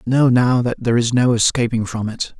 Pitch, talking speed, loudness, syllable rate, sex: 120 Hz, 250 wpm, -17 LUFS, 5.9 syllables/s, male